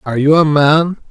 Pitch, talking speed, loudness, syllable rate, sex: 150 Hz, 220 wpm, -12 LUFS, 5.5 syllables/s, male